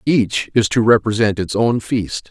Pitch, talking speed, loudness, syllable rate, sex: 110 Hz, 180 wpm, -17 LUFS, 4.2 syllables/s, male